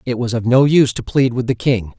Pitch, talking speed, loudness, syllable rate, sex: 125 Hz, 300 wpm, -16 LUFS, 6.0 syllables/s, male